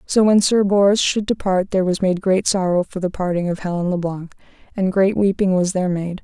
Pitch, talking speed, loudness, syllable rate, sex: 190 Hz, 230 wpm, -18 LUFS, 5.6 syllables/s, female